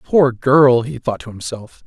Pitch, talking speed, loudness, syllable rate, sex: 125 Hz, 195 wpm, -15 LUFS, 4.0 syllables/s, male